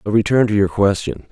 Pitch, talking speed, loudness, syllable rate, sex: 105 Hz, 230 wpm, -17 LUFS, 5.8 syllables/s, male